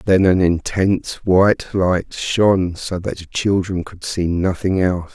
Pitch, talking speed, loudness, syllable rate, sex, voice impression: 90 Hz, 165 wpm, -18 LUFS, 4.2 syllables/s, male, very masculine, very adult-like, thick, cool, slightly calm, wild